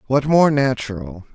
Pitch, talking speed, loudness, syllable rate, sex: 125 Hz, 135 wpm, -17 LUFS, 4.5 syllables/s, male